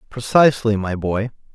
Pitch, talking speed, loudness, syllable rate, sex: 110 Hz, 115 wpm, -18 LUFS, 5.3 syllables/s, male